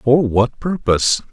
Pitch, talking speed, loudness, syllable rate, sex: 120 Hz, 135 wpm, -17 LUFS, 4.1 syllables/s, male